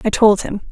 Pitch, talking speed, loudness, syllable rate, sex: 210 Hz, 250 wpm, -15 LUFS, 5.6 syllables/s, female